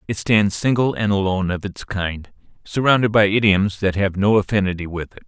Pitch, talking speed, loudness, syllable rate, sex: 100 Hz, 195 wpm, -19 LUFS, 5.5 syllables/s, male